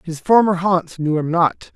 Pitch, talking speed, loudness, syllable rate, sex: 170 Hz, 205 wpm, -17 LUFS, 4.2 syllables/s, male